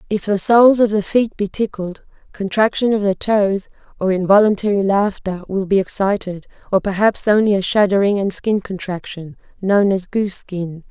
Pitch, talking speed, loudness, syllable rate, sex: 200 Hz, 165 wpm, -17 LUFS, 5.0 syllables/s, female